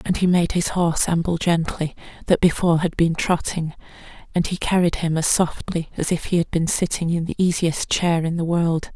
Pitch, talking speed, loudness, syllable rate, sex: 170 Hz, 210 wpm, -21 LUFS, 5.2 syllables/s, female